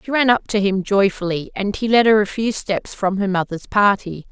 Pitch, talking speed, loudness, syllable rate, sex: 200 Hz, 235 wpm, -18 LUFS, 5.1 syllables/s, female